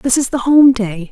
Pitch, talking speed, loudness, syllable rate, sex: 245 Hz, 270 wpm, -12 LUFS, 4.7 syllables/s, female